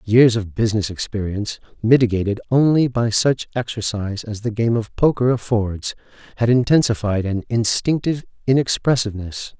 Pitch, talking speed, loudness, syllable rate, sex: 115 Hz, 125 wpm, -19 LUFS, 5.4 syllables/s, male